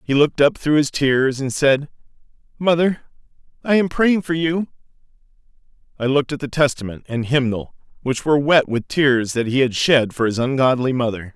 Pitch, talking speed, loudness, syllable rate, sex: 135 Hz, 180 wpm, -18 LUFS, 5.2 syllables/s, male